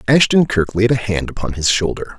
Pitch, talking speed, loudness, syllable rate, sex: 105 Hz, 220 wpm, -16 LUFS, 5.4 syllables/s, male